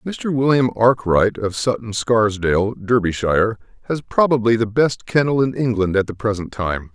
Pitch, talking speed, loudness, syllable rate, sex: 115 Hz, 155 wpm, -18 LUFS, 4.8 syllables/s, male